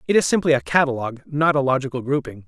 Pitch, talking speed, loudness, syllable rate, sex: 135 Hz, 220 wpm, -20 LUFS, 7.2 syllables/s, male